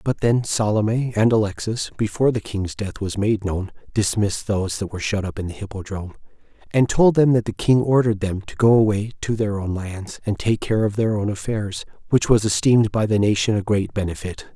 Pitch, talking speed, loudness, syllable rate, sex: 105 Hz, 215 wpm, -21 LUFS, 5.6 syllables/s, male